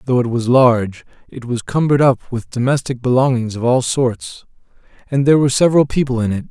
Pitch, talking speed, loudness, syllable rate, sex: 125 Hz, 195 wpm, -16 LUFS, 6.2 syllables/s, male